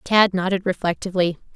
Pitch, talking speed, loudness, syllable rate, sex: 185 Hz, 115 wpm, -21 LUFS, 6.1 syllables/s, female